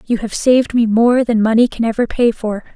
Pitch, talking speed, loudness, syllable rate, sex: 230 Hz, 240 wpm, -15 LUFS, 5.5 syllables/s, female